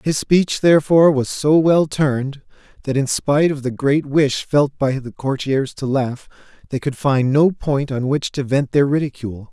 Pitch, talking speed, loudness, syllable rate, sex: 140 Hz, 195 wpm, -18 LUFS, 4.7 syllables/s, male